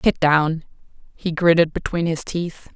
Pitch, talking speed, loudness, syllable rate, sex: 165 Hz, 155 wpm, -20 LUFS, 4.1 syllables/s, female